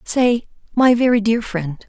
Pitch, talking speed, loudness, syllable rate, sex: 225 Hz, 160 wpm, -17 LUFS, 4.0 syllables/s, female